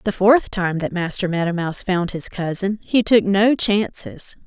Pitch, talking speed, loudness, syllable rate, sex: 195 Hz, 190 wpm, -19 LUFS, 4.5 syllables/s, female